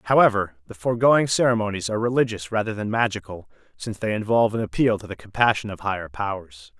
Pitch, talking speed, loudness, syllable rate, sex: 105 Hz, 175 wpm, -22 LUFS, 6.6 syllables/s, male